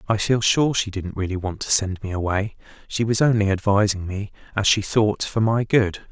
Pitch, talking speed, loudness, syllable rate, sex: 105 Hz, 215 wpm, -21 LUFS, 5.0 syllables/s, male